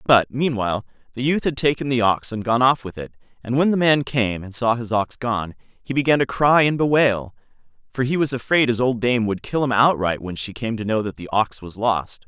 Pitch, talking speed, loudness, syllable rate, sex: 120 Hz, 245 wpm, -20 LUFS, 5.2 syllables/s, male